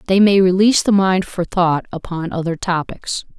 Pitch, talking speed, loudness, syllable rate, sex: 180 Hz, 175 wpm, -17 LUFS, 4.9 syllables/s, female